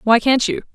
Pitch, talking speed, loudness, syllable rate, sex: 245 Hz, 240 wpm, -17 LUFS, 5.3 syllables/s, female